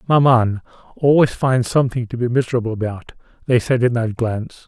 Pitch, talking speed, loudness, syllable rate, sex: 120 Hz, 165 wpm, -18 LUFS, 5.8 syllables/s, male